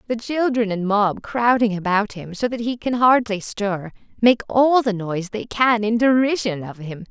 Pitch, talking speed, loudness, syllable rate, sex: 220 Hz, 195 wpm, -20 LUFS, 4.6 syllables/s, female